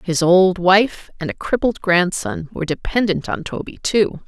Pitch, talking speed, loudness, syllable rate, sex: 185 Hz, 170 wpm, -18 LUFS, 4.5 syllables/s, female